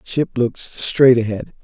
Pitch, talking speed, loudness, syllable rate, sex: 120 Hz, 145 wpm, -17 LUFS, 4.1 syllables/s, male